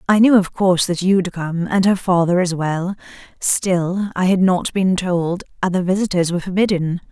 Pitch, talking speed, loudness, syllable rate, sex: 180 Hz, 185 wpm, -18 LUFS, 4.8 syllables/s, female